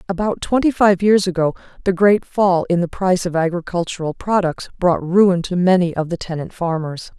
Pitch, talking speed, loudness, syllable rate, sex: 180 Hz, 185 wpm, -18 LUFS, 5.2 syllables/s, female